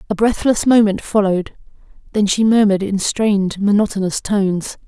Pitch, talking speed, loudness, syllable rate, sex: 205 Hz, 135 wpm, -16 LUFS, 5.4 syllables/s, female